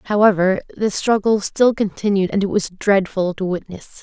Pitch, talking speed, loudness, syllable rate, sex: 200 Hz, 165 wpm, -18 LUFS, 4.6 syllables/s, female